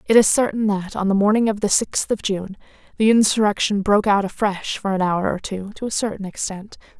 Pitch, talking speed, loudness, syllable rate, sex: 205 Hz, 225 wpm, -20 LUFS, 5.6 syllables/s, female